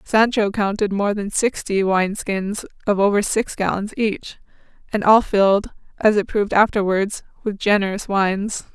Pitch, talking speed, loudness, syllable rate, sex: 205 Hz, 150 wpm, -19 LUFS, 4.6 syllables/s, female